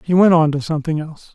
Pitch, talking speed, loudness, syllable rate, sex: 155 Hz, 270 wpm, -16 LUFS, 7.2 syllables/s, male